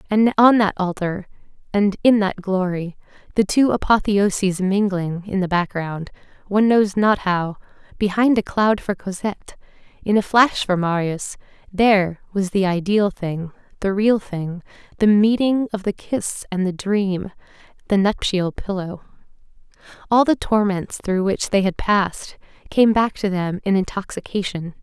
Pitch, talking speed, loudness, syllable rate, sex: 195 Hz, 150 wpm, -20 LUFS, 4.5 syllables/s, female